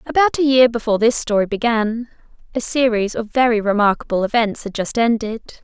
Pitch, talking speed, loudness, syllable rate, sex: 230 Hz, 170 wpm, -18 LUFS, 5.5 syllables/s, female